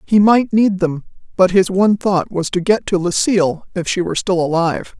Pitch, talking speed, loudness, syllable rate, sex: 185 Hz, 215 wpm, -16 LUFS, 5.4 syllables/s, female